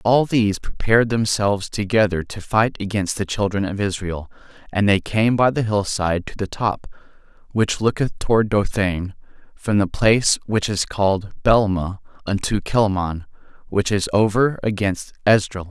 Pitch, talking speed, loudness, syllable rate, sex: 105 Hz, 150 wpm, -20 LUFS, 4.9 syllables/s, male